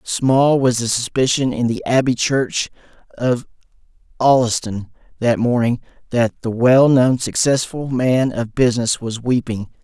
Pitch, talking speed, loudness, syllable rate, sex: 120 Hz, 130 wpm, -17 LUFS, 4.2 syllables/s, male